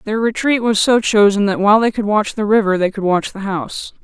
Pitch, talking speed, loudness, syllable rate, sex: 210 Hz, 255 wpm, -15 LUFS, 5.7 syllables/s, female